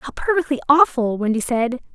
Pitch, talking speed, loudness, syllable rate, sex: 265 Hz, 155 wpm, -19 LUFS, 5.5 syllables/s, female